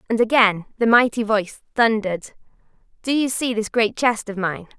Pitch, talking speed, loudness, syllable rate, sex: 220 Hz, 175 wpm, -20 LUFS, 5.4 syllables/s, female